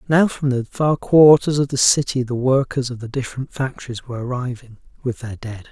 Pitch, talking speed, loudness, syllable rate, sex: 130 Hz, 200 wpm, -19 LUFS, 5.5 syllables/s, male